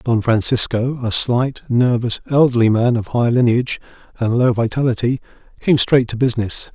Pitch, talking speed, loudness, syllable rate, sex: 120 Hz, 150 wpm, -17 LUFS, 5.1 syllables/s, male